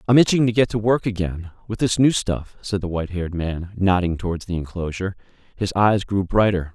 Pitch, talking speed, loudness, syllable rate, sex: 95 Hz, 205 wpm, -21 LUFS, 5.8 syllables/s, male